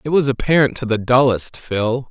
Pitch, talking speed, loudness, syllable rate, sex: 125 Hz, 200 wpm, -17 LUFS, 5.0 syllables/s, male